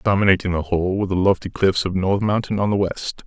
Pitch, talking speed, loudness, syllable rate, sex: 95 Hz, 240 wpm, -20 LUFS, 6.4 syllables/s, male